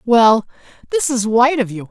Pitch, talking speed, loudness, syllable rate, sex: 235 Hz, 155 wpm, -15 LUFS, 5.2 syllables/s, female